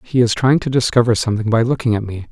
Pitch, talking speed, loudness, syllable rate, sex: 120 Hz, 260 wpm, -16 LUFS, 6.8 syllables/s, male